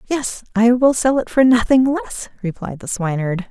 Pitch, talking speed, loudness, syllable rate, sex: 225 Hz, 190 wpm, -17 LUFS, 4.8 syllables/s, female